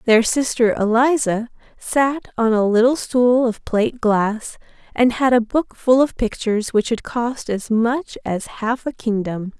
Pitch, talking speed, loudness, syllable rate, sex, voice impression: 235 Hz, 170 wpm, -19 LUFS, 4.0 syllables/s, female, very feminine, slightly young, very adult-like, thin, tensed, slightly weak, bright, slightly hard, clear, slightly fluent, slightly raspy, cute, slightly cool, intellectual, slightly refreshing, very sincere, very calm, friendly, reassuring, unique, elegant, sweet, lively, kind, slightly sharp, slightly modest, light